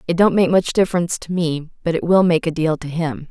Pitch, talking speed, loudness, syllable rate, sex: 170 Hz, 270 wpm, -18 LUFS, 6.0 syllables/s, female